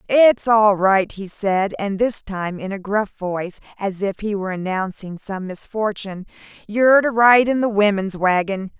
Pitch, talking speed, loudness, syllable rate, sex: 205 Hz, 175 wpm, -19 LUFS, 4.6 syllables/s, female